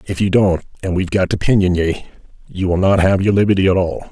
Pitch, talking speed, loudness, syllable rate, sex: 95 Hz, 250 wpm, -16 LUFS, 6.3 syllables/s, male